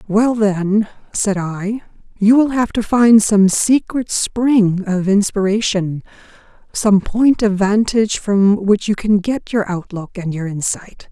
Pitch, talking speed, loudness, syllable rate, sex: 205 Hz, 150 wpm, -16 LUFS, 3.7 syllables/s, female